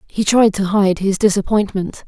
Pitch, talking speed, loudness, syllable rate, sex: 200 Hz, 175 wpm, -16 LUFS, 4.7 syllables/s, female